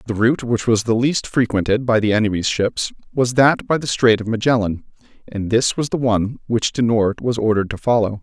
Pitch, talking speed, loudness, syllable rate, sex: 115 Hz, 220 wpm, -18 LUFS, 5.6 syllables/s, male